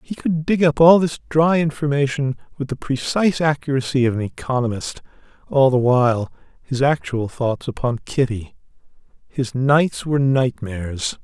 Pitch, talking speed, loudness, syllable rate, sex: 135 Hz, 145 wpm, -19 LUFS, 4.9 syllables/s, male